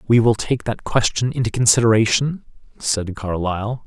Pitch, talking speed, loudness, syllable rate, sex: 115 Hz, 140 wpm, -19 LUFS, 5.0 syllables/s, male